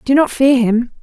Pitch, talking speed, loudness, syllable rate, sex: 255 Hz, 235 wpm, -13 LUFS, 4.7 syllables/s, female